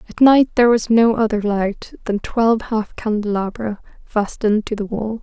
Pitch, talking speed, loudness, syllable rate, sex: 220 Hz, 170 wpm, -18 LUFS, 5.0 syllables/s, female